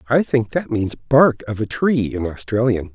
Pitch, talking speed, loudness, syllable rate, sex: 115 Hz, 205 wpm, -19 LUFS, 4.4 syllables/s, male